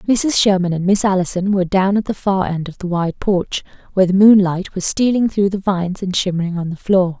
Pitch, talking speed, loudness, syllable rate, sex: 190 Hz, 235 wpm, -17 LUFS, 5.6 syllables/s, female